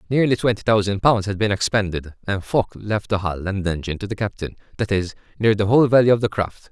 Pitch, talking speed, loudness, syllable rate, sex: 100 Hz, 230 wpm, -20 LUFS, 6.2 syllables/s, male